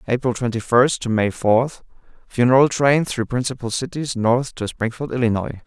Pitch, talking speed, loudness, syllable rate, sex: 120 Hz, 160 wpm, -20 LUFS, 5.0 syllables/s, male